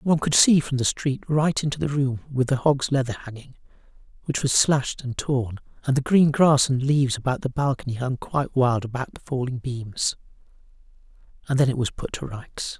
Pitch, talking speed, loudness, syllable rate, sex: 135 Hz, 200 wpm, -23 LUFS, 5.4 syllables/s, male